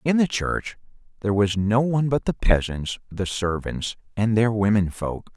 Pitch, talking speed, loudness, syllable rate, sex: 110 Hz, 180 wpm, -23 LUFS, 4.7 syllables/s, male